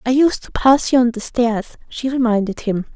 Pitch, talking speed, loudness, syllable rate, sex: 240 Hz, 225 wpm, -17 LUFS, 5.1 syllables/s, female